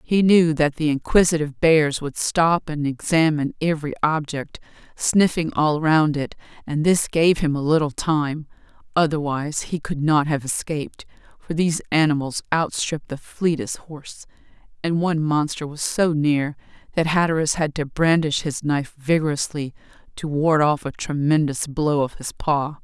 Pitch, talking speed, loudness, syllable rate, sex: 155 Hz, 155 wpm, -21 LUFS, 4.8 syllables/s, female